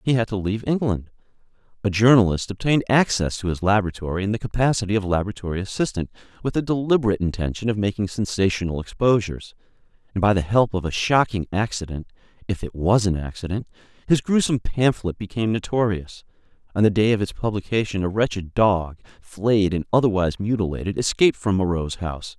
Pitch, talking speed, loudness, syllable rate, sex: 105 Hz, 165 wpm, -22 LUFS, 6.1 syllables/s, male